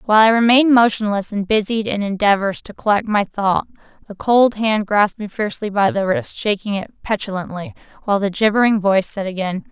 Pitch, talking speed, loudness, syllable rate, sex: 210 Hz, 185 wpm, -17 LUFS, 5.9 syllables/s, female